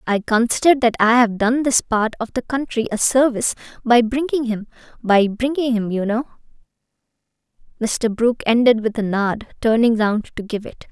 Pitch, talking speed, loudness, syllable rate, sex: 230 Hz, 170 wpm, -18 LUFS, 5.1 syllables/s, female